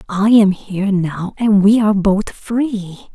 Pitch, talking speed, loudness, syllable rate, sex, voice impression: 205 Hz, 170 wpm, -15 LUFS, 4.2 syllables/s, female, feminine, middle-aged, tensed, powerful, slightly hard, halting, intellectual, calm, friendly, reassuring, elegant, lively, slightly strict